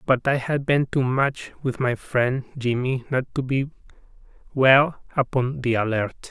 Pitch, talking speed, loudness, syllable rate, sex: 130 Hz, 160 wpm, -22 LUFS, 4.8 syllables/s, male